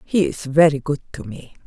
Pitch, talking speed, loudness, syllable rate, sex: 150 Hz, 215 wpm, -19 LUFS, 5.1 syllables/s, female